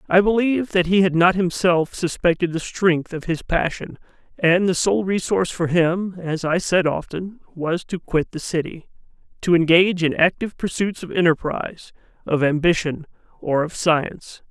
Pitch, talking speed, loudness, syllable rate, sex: 175 Hz, 160 wpm, -20 LUFS, 4.9 syllables/s, male